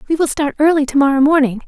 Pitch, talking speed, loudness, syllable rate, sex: 285 Hz, 250 wpm, -14 LUFS, 6.9 syllables/s, female